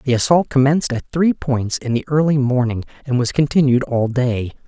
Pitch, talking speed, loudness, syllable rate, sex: 130 Hz, 190 wpm, -18 LUFS, 5.1 syllables/s, male